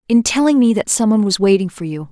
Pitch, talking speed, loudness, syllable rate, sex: 210 Hz, 285 wpm, -14 LUFS, 6.7 syllables/s, female